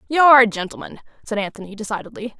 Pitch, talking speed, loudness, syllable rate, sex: 220 Hz, 150 wpm, -18 LUFS, 7.3 syllables/s, female